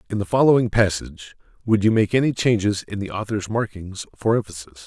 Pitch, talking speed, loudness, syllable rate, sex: 105 Hz, 185 wpm, -21 LUFS, 5.9 syllables/s, male